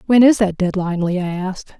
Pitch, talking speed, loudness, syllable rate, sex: 190 Hz, 200 wpm, -17 LUFS, 5.8 syllables/s, female